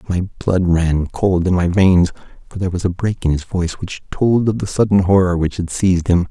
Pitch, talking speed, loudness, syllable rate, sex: 90 Hz, 240 wpm, -17 LUFS, 5.4 syllables/s, male